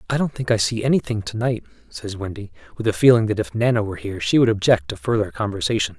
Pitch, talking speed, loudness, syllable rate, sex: 105 Hz, 240 wpm, -21 LUFS, 6.8 syllables/s, male